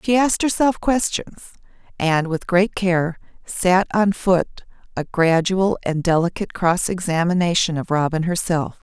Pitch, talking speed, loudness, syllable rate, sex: 180 Hz, 135 wpm, -19 LUFS, 4.4 syllables/s, female